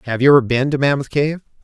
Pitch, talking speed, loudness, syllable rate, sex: 135 Hz, 255 wpm, -16 LUFS, 6.8 syllables/s, male